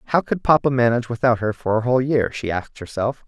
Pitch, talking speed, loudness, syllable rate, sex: 120 Hz, 240 wpm, -20 LUFS, 6.7 syllables/s, male